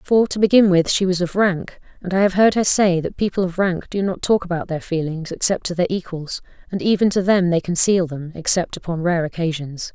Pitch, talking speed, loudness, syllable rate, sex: 180 Hz, 235 wpm, -19 LUFS, 5.5 syllables/s, female